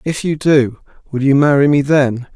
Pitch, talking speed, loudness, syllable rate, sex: 140 Hz, 180 wpm, -14 LUFS, 4.8 syllables/s, male